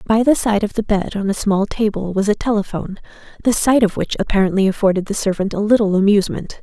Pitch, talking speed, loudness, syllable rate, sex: 205 Hz, 215 wpm, -17 LUFS, 6.3 syllables/s, female